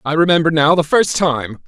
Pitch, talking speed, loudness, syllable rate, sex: 155 Hz, 215 wpm, -14 LUFS, 5.1 syllables/s, male